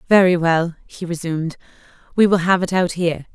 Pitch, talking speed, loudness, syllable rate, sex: 175 Hz, 180 wpm, -18 LUFS, 5.8 syllables/s, female